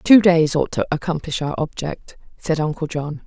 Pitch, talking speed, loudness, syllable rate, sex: 160 Hz, 185 wpm, -20 LUFS, 4.7 syllables/s, female